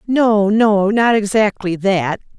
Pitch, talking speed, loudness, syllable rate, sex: 205 Hz, 125 wpm, -15 LUFS, 3.4 syllables/s, female